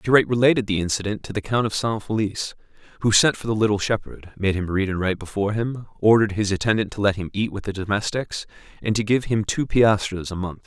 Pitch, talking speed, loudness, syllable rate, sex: 105 Hz, 235 wpm, -22 LUFS, 6.5 syllables/s, male